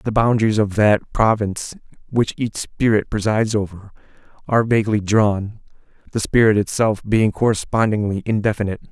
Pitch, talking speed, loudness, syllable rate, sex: 105 Hz, 130 wpm, -19 LUFS, 5.5 syllables/s, male